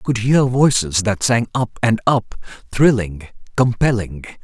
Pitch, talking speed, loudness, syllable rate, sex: 115 Hz, 150 wpm, -17 LUFS, 4.3 syllables/s, male